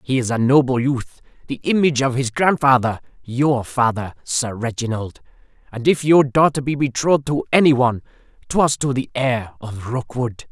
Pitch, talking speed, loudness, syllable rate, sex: 130 Hz, 160 wpm, -19 LUFS, 4.9 syllables/s, male